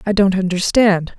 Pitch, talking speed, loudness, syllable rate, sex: 190 Hz, 150 wpm, -15 LUFS, 4.7 syllables/s, female